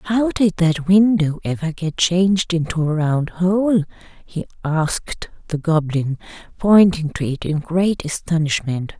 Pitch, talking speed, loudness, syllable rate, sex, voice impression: 170 Hz, 140 wpm, -18 LUFS, 4.0 syllables/s, female, very feminine, slightly young, adult-like, very thin, tensed, slightly weak, slightly dark, hard